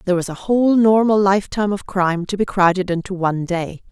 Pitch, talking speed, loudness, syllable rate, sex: 190 Hz, 215 wpm, -18 LUFS, 6.5 syllables/s, female